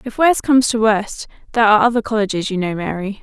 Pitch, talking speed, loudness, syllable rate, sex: 215 Hz, 225 wpm, -16 LUFS, 7.0 syllables/s, female